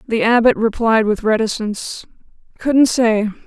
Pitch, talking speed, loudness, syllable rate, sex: 225 Hz, 120 wpm, -16 LUFS, 4.7 syllables/s, female